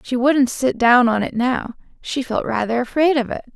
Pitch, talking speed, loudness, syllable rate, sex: 250 Hz, 205 wpm, -18 LUFS, 4.8 syllables/s, female